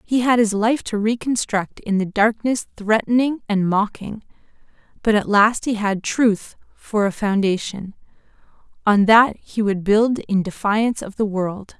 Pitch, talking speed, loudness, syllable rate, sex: 215 Hz, 160 wpm, -19 LUFS, 4.2 syllables/s, female